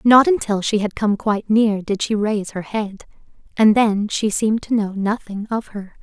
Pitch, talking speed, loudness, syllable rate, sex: 210 Hz, 210 wpm, -19 LUFS, 4.9 syllables/s, female